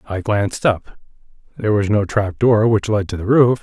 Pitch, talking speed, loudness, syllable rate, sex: 105 Hz, 200 wpm, -17 LUFS, 5.3 syllables/s, male